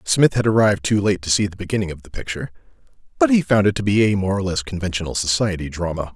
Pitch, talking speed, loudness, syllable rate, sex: 95 Hz, 245 wpm, -19 LUFS, 6.9 syllables/s, male